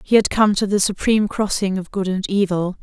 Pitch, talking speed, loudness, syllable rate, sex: 195 Hz, 235 wpm, -19 LUFS, 5.6 syllables/s, female